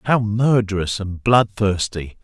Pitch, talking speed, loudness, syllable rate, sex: 105 Hz, 105 wpm, -19 LUFS, 3.7 syllables/s, male